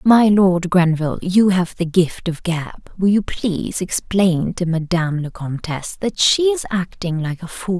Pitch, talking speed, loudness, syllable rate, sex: 180 Hz, 185 wpm, -18 LUFS, 4.4 syllables/s, female